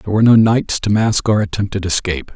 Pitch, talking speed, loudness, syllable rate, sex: 105 Hz, 230 wpm, -15 LUFS, 6.5 syllables/s, male